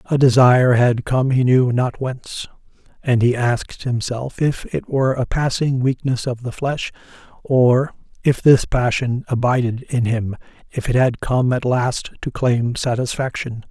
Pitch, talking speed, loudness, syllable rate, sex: 125 Hz, 160 wpm, -18 LUFS, 4.3 syllables/s, male